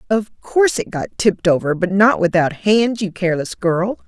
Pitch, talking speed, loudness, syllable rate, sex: 195 Hz, 175 wpm, -17 LUFS, 5.0 syllables/s, female